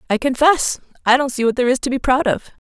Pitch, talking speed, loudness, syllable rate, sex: 260 Hz, 270 wpm, -17 LUFS, 6.5 syllables/s, female